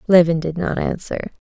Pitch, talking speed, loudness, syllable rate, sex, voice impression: 170 Hz, 165 wpm, -20 LUFS, 5.7 syllables/s, female, very feminine, adult-like, slightly intellectual, slightly calm, slightly sweet